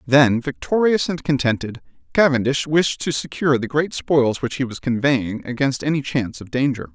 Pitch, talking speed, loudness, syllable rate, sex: 135 Hz, 175 wpm, -20 LUFS, 5.1 syllables/s, male